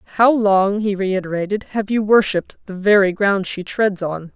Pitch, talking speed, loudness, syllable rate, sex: 195 Hz, 180 wpm, -18 LUFS, 4.9 syllables/s, female